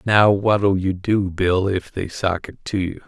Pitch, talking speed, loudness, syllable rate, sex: 95 Hz, 215 wpm, -20 LUFS, 3.8 syllables/s, male